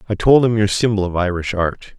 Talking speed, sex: 240 wpm, male